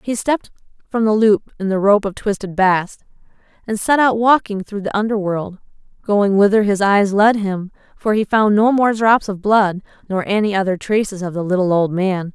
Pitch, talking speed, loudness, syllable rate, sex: 205 Hz, 200 wpm, -17 LUFS, 5.0 syllables/s, female